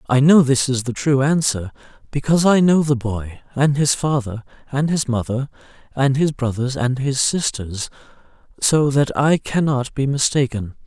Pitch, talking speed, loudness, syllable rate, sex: 135 Hz, 165 wpm, -18 LUFS, 4.6 syllables/s, male